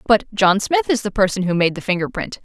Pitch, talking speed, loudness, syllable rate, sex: 205 Hz, 270 wpm, -18 LUFS, 5.8 syllables/s, female